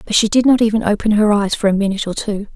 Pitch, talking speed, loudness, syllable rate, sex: 210 Hz, 305 wpm, -15 LUFS, 7.1 syllables/s, female